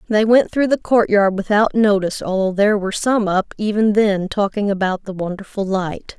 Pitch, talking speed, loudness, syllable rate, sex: 205 Hz, 195 wpm, -17 LUFS, 5.2 syllables/s, female